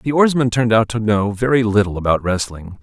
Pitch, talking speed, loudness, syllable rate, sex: 110 Hz, 210 wpm, -17 LUFS, 5.8 syllables/s, male